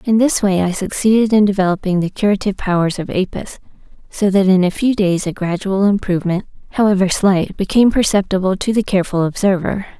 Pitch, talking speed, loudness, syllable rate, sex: 195 Hz, 175 wpm, -16 LUFS, 6.0 syllables/s, female